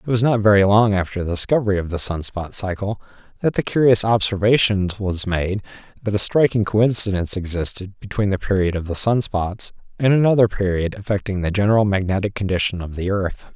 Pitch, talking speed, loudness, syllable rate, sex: 100 Hz, 185 wpm, -19 LUFS, 5.8 syllables/s, male